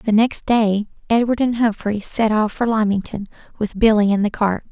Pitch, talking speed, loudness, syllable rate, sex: 215 Hz, 190 wpm, -18 LUFS, 4.9 syllables/s, female